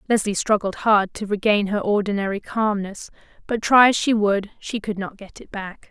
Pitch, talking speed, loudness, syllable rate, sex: 205 Hz, 195 wpm, -21 LUFS, 4.9 syllables/s, female